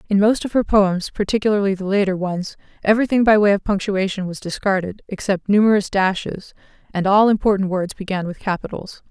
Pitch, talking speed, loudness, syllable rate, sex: 200 Hz, 170 wpm, -19 LUFS, 5.7 syllables/s, female